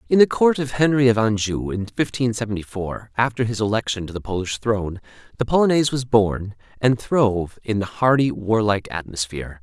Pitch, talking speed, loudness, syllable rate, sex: 110 Hz, 180 wpm, -21 LUFS, 5.6 syllables/s, male